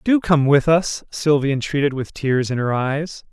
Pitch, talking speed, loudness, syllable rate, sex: 145 Hz, 200 wpm, -19 LUFS, 4.5 syllables/s, male